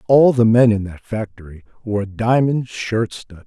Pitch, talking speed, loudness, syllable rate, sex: 110 Hz, 175 wpm, -17 LUFS, 4.3 syllables/s, male